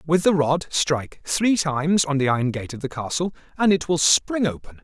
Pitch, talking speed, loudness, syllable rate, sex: 155 Hz, 225 wpm, -21 LUFS, 5.2 syllables/s, male